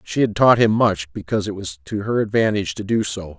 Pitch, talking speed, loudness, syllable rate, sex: 110 Hz, 250 wpm, -19 LUFS, 6.1 syllables/s, male